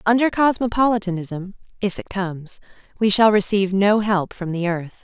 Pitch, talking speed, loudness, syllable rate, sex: 200 Hz, 155 wpm, -20 LUFS, 5.2 syllables/s, female